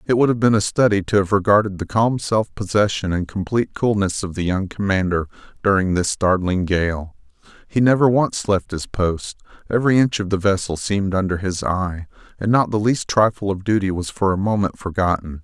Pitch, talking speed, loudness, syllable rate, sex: 100 Hz, 200 wpm, -19 LUFS, 5.4 syllables/s, male